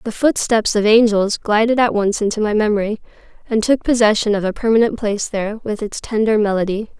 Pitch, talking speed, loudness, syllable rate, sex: 215 Hz, 190 wpm, -17 LUFS, 5.9 syllables/s, female